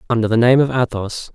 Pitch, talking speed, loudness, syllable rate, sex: 120 Hz, 225 wpm, -16 LUFS, 6.0 syllables/s, male